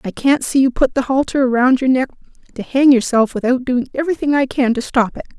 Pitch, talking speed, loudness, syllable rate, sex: 260 Hz, 235 wpm, -16 LUFS, 6.0 syllables/s, female